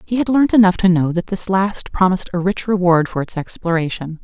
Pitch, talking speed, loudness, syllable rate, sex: 185 Hz, 225 wpm, -17 LUFS, 5.6 syllables/s, female